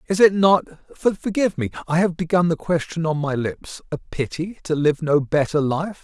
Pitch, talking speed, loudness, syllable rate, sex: 165 Hz, 180 wpm, -21 LUFS, 4.7 syllables/s, male